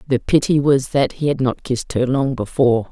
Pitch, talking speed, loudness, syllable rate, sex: 130 Hz, 225 wpm, -18 LUFS, 5.6 syllables/s, female